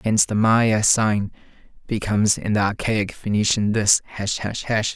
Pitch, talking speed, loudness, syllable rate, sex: 105 Hz, 155 wpm, -20 LUFS, 4.5 syllables/s, male